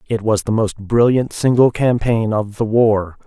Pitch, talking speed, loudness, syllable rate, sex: 110 Hz, 185 wpm, -16 LUFS, 4.3 syllables/s, male